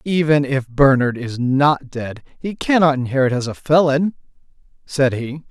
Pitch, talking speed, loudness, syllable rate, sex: 140 Hz, 155 wpm, -17 LUFS, 4.4 syllables/s, male